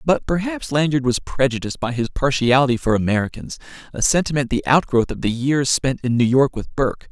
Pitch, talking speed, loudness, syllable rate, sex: 135 Hz, 195 wpm, -19 LUFS, 5.8 syllables/s, male